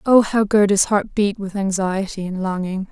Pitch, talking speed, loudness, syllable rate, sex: 195 Hz, 185 wpm, -19 LUFS, 4.7 syllables/s, female